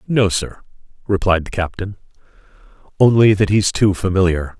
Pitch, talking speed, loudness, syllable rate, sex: 95 Hz, 130 wpm, -16 LUFS, 5.0 syllables/s, male